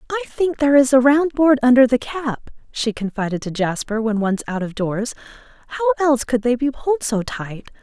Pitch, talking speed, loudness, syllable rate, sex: 255 Hz, 205 wpm, -19 LUFS, 5.4 syllables/s, female